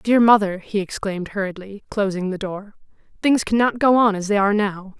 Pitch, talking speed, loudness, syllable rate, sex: 205 Hz, 190 wpm, -20 LUFS, 5.4 syllables/s, female